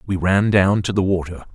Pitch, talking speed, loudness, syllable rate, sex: 95 Hz, 235 wpm, -18 LUFS, 5.2 syllables/s, male